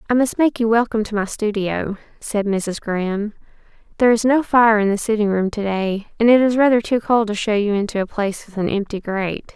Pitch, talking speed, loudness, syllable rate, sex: 215 Hz, 230 wpm, -19 LUFS, 5.8 syllables/s, female